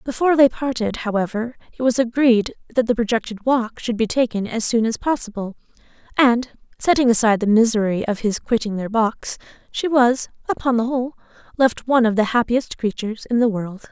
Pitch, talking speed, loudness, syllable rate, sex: 235 Hz, 180 wpm, -19 LUFS, 5.6 syllables/s, female